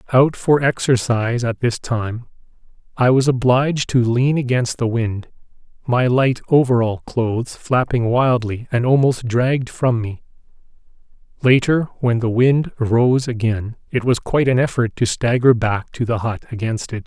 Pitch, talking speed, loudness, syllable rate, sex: 120 Hz, 155 wpm, -18 LUFS, 4.5 syllables/s, male